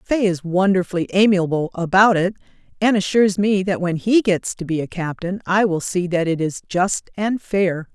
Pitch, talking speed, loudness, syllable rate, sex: 185 Hz, 195 wpm, -19 LUFS, 4.9 syllables/s, female